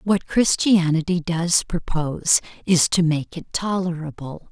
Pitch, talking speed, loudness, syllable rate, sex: 170 Hz, 120 wpm, -20 LUFS, 4.1 syllables/s, female